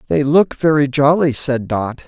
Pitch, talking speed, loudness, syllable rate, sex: 140 Hz, 175 wpm, -15 LUFS, 4.4 syllables/s, male